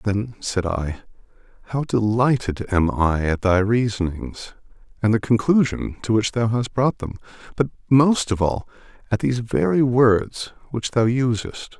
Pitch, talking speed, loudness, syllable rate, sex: 110 Hz, 155 wpm, -21 LUFS, 4.2 syllables/s, male